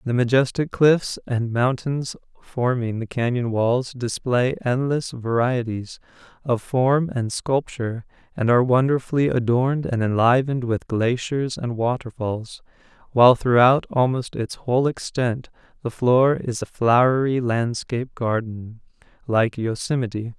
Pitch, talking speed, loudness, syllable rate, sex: 125 Hz, 120 wpm, -21 LUFS, 4.4 syllables/s, male